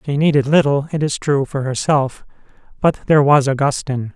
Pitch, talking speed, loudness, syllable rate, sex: 140 Hz, 175 wpm, -17 LUFS, 5.5 syllables/s, male